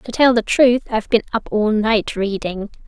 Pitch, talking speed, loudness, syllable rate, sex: 220 Hz, 230 wpm, -17 LUFS, 4.9 syllables/s, female